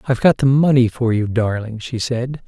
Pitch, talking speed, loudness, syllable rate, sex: 120 Hz, 220 wpm, -17 LUFS, 5.2 syllables/s, male